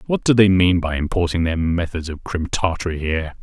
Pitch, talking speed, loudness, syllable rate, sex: 85 Hz, 210 wpm, -19 LUFS, 5.6 syllables/s, male